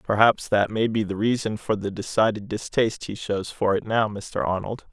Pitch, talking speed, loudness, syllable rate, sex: 105 Hz, 205 wpm, -24 LUFS, 5.1 syllables/s, male